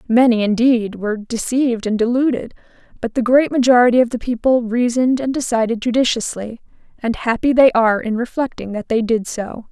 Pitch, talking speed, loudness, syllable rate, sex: 235 Hz, 165 wpm, -17 LUFS, 5.6 syllables/s, female